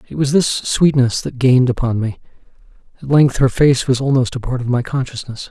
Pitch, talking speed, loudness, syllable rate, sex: 130 Hz, 205 wpm, -16 LUFS, 5.4 syllables/s, male